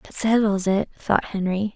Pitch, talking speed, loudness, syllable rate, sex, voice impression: 200 Hz, 170 wpm, -22 LUFS, 4.3 syllables/s, female, feminine, young, cute, friendly, lively